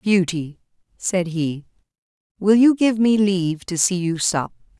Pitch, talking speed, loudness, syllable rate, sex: 185 Hz, 150 wpm, -19 LUFS, 4.1 syllables/s, female